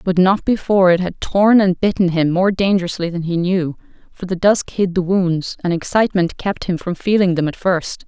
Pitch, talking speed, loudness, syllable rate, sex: 185 Hz, 215 wpm, -17 LUFS, 5.2 syllables/s, female